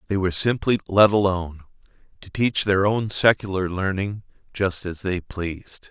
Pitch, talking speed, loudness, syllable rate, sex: 95 Hz, 150 wpm, -22 LUFS, 4.8 syllables/s, male